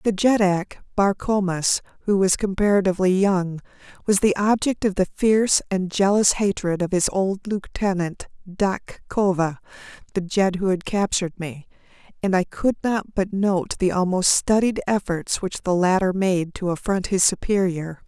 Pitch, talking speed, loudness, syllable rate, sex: 190 Hz, 155 wpm, -21 LUFS, 4.5 syllables/s, female